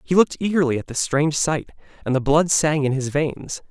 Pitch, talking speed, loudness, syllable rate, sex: 150 Hz, 225 wpm, -20 LUFS, 5.6 syllables/s, male